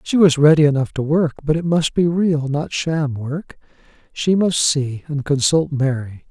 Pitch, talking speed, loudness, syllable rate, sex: 150 Hz, 190 wpm, -18 LUFS, 4.3 syllables/s, male